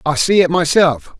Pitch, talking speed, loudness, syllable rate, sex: 165 Hz, 200 wpm, -14 LUFS, 4.7 syllables/s, male